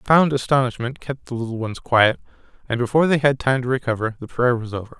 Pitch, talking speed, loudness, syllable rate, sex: 125 Hz, 215 wpm, -20 LUFS, 6.4 syllables/s, male